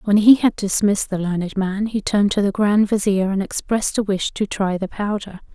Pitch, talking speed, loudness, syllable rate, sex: 200 Hz, 225 wpm, -19 LUFS, 5.5 syllables/s, female